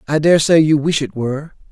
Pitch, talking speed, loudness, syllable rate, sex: 150 Hz, 245 wpm, -15 LUFS, 5.6 syllables/s, male